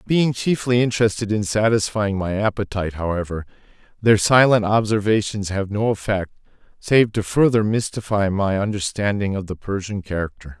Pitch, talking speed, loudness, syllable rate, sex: 105 Hz, 135 wpm, -20 LUFS, 5.2 syllables/s, male